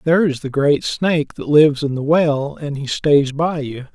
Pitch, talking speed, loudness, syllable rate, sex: 145 Hz, 230 wpm, -17 LUFS, 4.8 syllables/s, male